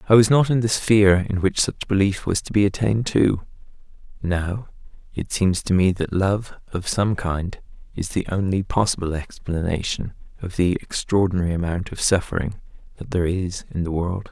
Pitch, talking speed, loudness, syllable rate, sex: 95 Hz, 175 wpm, -22 LUFS, 5.1 syllables/s, male